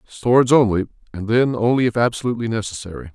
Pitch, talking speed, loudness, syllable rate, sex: 115 Hz, 150 wpm, -18 LUFS, 6.5 syllables/s, male